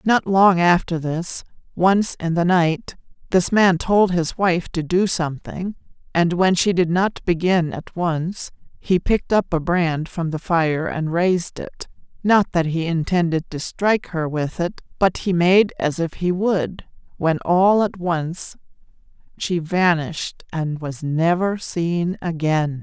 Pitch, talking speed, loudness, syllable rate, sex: 175 Hz, 160 wpm, -20 LUFS, 3.8 syllables/s, female